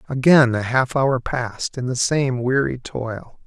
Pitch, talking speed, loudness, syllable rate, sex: 125 Hz, 175 wpm, -20 LUFS, 4.0 syllables/s, male